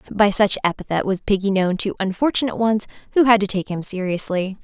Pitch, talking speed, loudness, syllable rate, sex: 200 Hz, 195 wpm, -20 LUFS, 6.0 syllables/s, female